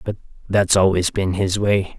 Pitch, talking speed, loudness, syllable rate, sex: 95 Hz, 180 wpm, -18 LUFS, 4.5 syllables/s, male